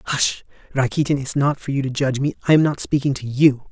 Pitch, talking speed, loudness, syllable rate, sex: 135 Hz, 240 wpm, -20 LUFS, 6.4 syllables/s, male